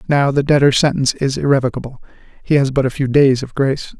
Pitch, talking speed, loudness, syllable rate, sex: 135 Hz, 210 wpm, -15 LUFS, 6.6 syllables/s, male